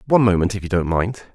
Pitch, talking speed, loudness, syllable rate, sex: 100 Hz, 270 wpm, -19 LUFS, 7.0 syllables/s, male